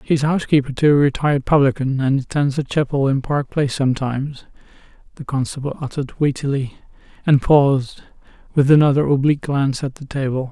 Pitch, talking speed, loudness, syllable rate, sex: 140 Hz, 155 wpm, -18 LUFS, 6.2 syllables/s, male